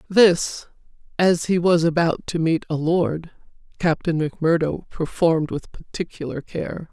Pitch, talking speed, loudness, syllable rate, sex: 165 Hz, 130 wpm, -21 LUFS, 4.2 syllables/s, female